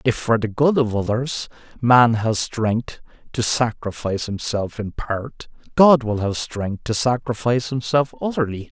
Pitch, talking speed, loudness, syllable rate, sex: 120 Hz, 150 wpm, -20 LUFS, 4.3 syllables/s, male